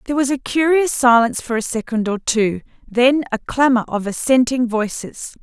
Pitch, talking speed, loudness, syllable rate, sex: 245 Hz, 175 wpm, -17 LUFS, 5.1 syllables/s, female